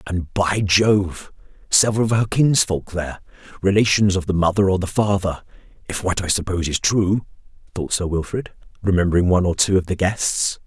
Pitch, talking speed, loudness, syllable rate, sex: 95 Hz, 175 wpm, -19 LUFS, 5.4 syllables/s, male